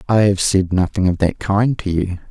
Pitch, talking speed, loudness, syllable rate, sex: 95 Hz, 235 wpm, -17 LUFS, 4.9 syllables/s, male